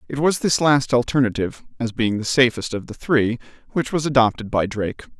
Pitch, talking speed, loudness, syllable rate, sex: 125 Hz, 195 wpm, -20 LUFS, 5.7 syllables/s, male